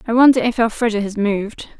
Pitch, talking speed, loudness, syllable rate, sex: 225 Hz, 200 wpm, -17 LUFS, 6.4 syllables/s, female